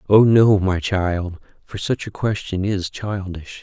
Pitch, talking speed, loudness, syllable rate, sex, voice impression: 95 Hz, 165 wpm, -20 LUFS, 2.2 syllables/s, male, masculine, adult-like, intellectual, sincere, slightly calm, reassuring, elegant, slightly sweet